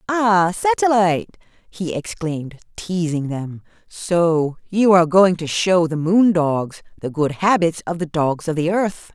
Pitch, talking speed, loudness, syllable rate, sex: 170 Hz, 155 wpm, -18 LUFS, 4.0 syllables/s, female